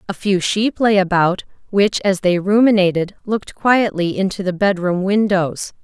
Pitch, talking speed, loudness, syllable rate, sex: 195 Hz, 155 wpm, -17 LUFS, 4.6 syllables/s, female